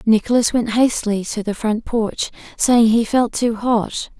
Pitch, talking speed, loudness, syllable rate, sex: 225 Hz, 170 wpm, -18 LUFS, 4.2 syllables/s, female